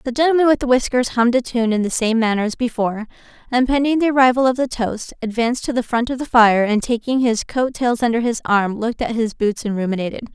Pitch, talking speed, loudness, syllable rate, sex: 235 Hz, 245 wpm, -18 LUFS, 6.3 syllables/s, female